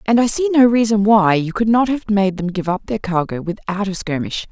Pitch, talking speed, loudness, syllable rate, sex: 205 Hz, 250 wpm, -17 LUFS, 5.3 syllables/s, female